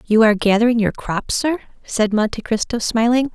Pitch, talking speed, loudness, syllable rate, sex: 230 Hz, 180 wpm, -18 LUFS, 5.4 syllables/s, female